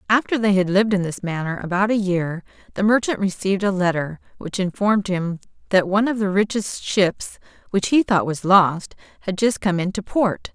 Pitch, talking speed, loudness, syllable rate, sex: 195 Hz, 195 wpm, -20 LUFS, 5.3 syllables/s, female